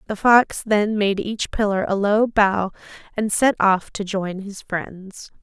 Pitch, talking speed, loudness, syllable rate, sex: 205 Hz, 175 wpm, -20 LUFS, 3.7 syllables/s, female